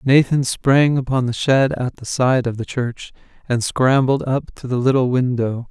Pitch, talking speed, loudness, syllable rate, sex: 130 Hz, 190 wpm, -18 LUFS, 4.4 syllables/s, male